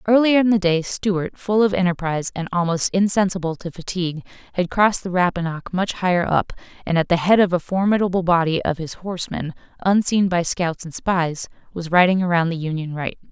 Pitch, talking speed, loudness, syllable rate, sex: 180 Hz, 190 wpm, -20 LUFS, 5.7 syllables/s, female